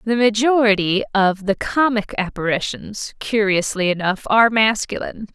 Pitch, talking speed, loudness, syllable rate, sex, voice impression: 210 Hz, 110 wpm, -18 LUFS, 4.8 syllables/s, female, very feminine, slightly young, slightly adult-like, very thin, tensed, slightly powerful, very bright, hard, very clear, fluent, cool, very intellectual, very refreshing, sincere, very calm, very friendly, reassuring, slightly unique, very elegant, slightly sweet, very lively, kind